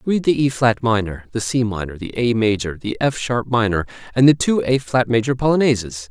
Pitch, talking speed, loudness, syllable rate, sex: 120 Hz, 215 wpm, -19 LUFS, 5.4 syllables/s, male